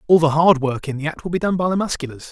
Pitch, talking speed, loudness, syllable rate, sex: 160 Hz, 310 wpm, -19 LUFS, 6.6 syllables/s, male